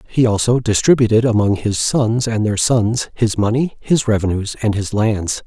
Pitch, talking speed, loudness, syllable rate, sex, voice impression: 110 Hz, 175 wpm, -16 LUFS, 4.7 syllables/s, male, masculine, adult-like, tensed, slightly hard, clear, fluent, cool, intellectual, calm, wild, slightly lively, slightly strict